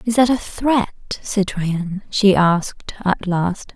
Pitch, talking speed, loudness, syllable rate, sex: 200 Hz, 145 wpm, -19 LUFS, 3.2 syllables/s, female